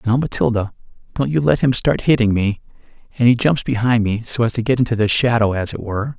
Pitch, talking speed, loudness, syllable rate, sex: 120 Hz, 235 wpm, -18 LUFS, 6.1 syllables/s, male